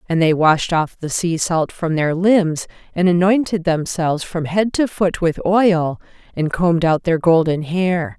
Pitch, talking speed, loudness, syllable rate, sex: 170 Hz, 185 wpm, -17 LUFS, 4.2 syllables/s, female